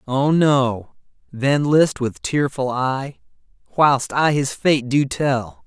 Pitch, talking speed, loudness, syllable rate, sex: 135 Hz, 140 wpm, -19 LUFS, 3.0 syllables/s, male